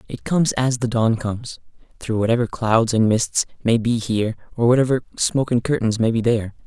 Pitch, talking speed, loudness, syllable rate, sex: 115 Hz, 200 wpm, -20 LUFS, 5.8 syllables/s, male